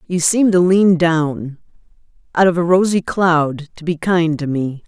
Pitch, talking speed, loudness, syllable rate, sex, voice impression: 170 Hz, 160 wpm, -16 LUFS, 4.3 syllables/s, female, feminine, adult-like, tensed, powerful, clear, fluent, intellectual, elegant, strict, sharp